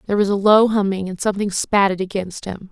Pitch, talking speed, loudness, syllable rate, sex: 195 Hz, 220 wpm, -18 LUFS, 6.3 syllables/s, female